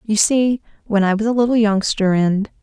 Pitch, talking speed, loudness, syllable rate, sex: 215 Hz, 205 wpm, -17 LUFS, 5.1 syllables/s, female